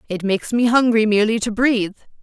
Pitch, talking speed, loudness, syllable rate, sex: 220 Hz, 190 wpm, -18 LUFS, 6.8 syllables/s, female